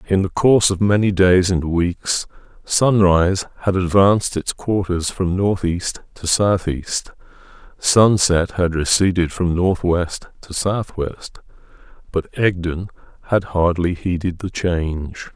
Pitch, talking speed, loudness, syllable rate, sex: 90 Hz, 120 wpm, -18 LUFS, 3.9 syllables/s, male